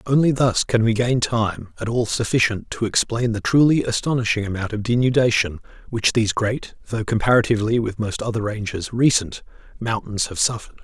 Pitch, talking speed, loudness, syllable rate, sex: 115 Hz, 165 wpm, -20 LUFS, 5.5 syllables/s, male